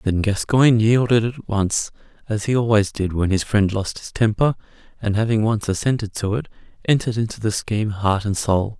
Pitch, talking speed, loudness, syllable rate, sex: 110 Hz, 190 wpm, -20 LUFS, 5.4 syllables/s, male